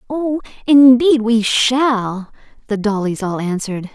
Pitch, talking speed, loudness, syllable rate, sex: 230 Hz, 120 wpm, -15 LUFS, 3.9 syllables/s, female